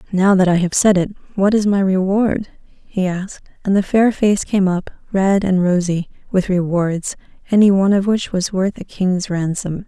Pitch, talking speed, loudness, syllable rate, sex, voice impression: 190 Hz, 190 wpm, -17 LUFS, 4.8 syllables/s, female, feminine, adult-like, slightly weak, soft, slightly muffled, fluent, calm, reassuring, elegant, kind, modest